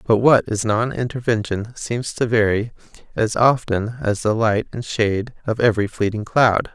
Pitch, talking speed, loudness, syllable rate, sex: 115 Hz, 170 wpm, -20 LUFS, 4.7 syllables/s, male